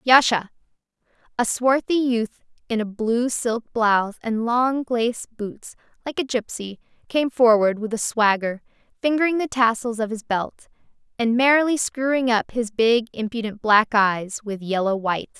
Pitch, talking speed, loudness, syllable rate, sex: 230 Hz, 150 wpm, -21 LUFS, 4.6 syllables/s, female